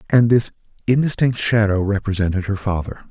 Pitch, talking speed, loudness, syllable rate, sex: 105 Hz, 135 wpm, -19 LUFS, 5.5 syllables/s, male